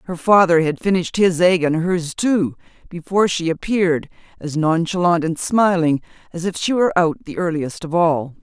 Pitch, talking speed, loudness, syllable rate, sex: 170 Hz, 180 wpm, -18 LUFS, 5.2 syllables/s, female